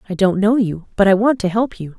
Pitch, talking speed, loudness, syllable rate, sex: 200 Hz, 300 wpm, -17 LUFS, 5.8 syllables/s, female